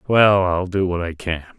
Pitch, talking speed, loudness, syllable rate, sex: 90 Hz, 225 wpm, -19 LUFS, 4.6 syllables/s, male